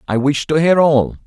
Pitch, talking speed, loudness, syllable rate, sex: 140 Hz, 240 wpm, -14 LUFS, 4.8 syllables/s, male